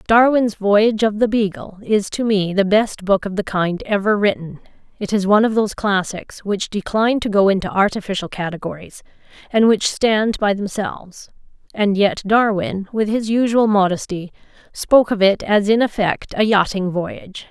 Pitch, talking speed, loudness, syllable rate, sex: 205 Hz, 170 wpm, -18 LUFS, 5.0 syllables/s, female